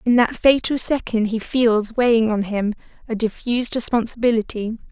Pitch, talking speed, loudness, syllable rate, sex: 230 Hz, 145 wpm, -19 LUFS, 5.1 syllables/s, female